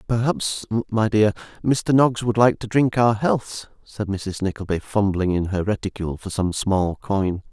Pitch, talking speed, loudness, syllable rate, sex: 105 Hz, 175 wpm, -21 LUFS, 4.4 syllables/s, male